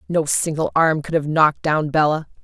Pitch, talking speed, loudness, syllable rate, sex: 155 Hz, 195 wpm, -19 LUFS, 5.2 syllables/s, female